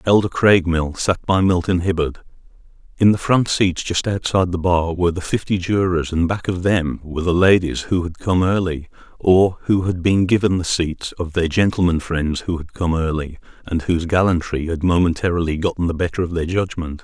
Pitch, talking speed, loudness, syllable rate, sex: 90 Hz, 195 wpm, -19 LUFS, 5.3 syllables/s, male